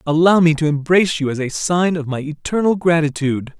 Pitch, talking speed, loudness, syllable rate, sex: 160 Hz, 200 wpm, -17 LUFS, 5.8 syllables/s, male